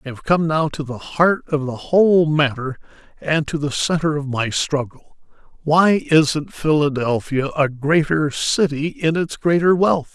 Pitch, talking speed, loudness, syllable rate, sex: 150 Hz, 165 wpm, -18 LUFS, 4.2 syllables/s, male